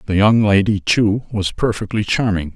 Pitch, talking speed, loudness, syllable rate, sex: 105 Hz, 165 wpm, -17 LUFS, 4.8 syllables/s, male